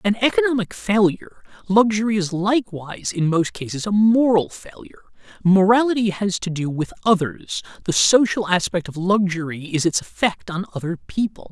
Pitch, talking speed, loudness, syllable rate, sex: 190 Hz, 150 wpm, -20 LUFS, 5.3 syllables/s, male